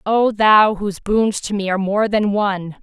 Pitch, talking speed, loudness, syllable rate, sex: 205 Hz, 210 wpm, -17 LUFS, 4.9 syllables/s, female